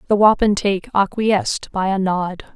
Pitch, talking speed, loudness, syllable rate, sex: 200 Hz, 140 wpm, -18 LUFS, 4.9 syllables/s, female